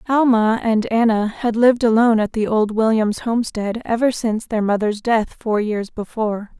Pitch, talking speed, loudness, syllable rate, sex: 220 Hz, 175 wpm, -18 LUFS, 5.1 syllables/s, female